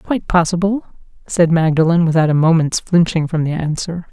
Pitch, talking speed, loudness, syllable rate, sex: 165 Hz, 160 wpm, -15 LUFS, 5.5 syllables/s, female